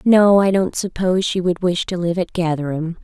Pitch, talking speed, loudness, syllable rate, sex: 180 Hz, 220 wpm, -18 LUFS, 5.2 syllables/s, female